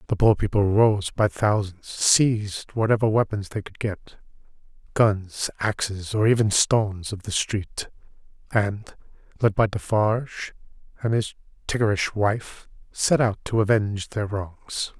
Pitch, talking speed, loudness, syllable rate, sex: 105 Hz, 130 wpm, -23 LUFS, 4.2 syllables/s, male